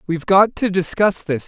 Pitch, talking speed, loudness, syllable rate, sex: 180 Hz, 205 wpm, -17 LUFS, 5.3 syllables/s, male